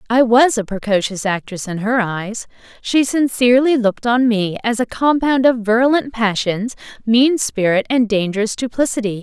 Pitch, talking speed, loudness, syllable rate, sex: 230 Hz, 155 wpm, -16 LUFS, 4.9 syllables/s, female